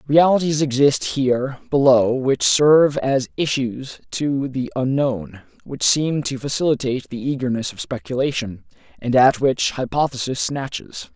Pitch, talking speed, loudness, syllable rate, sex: 130 Hz, 130 wpm, -19 LUFS, 4.3 syllables/s, male